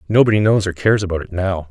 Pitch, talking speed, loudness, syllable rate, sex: 100 Hz, 245 wpm, -17 LUFS, 7.2 syllables/s, male